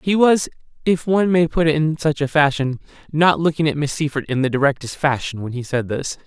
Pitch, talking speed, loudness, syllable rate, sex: 150 Hz, 230 wpm, -19 LUFS, 5.7 syllables/s, male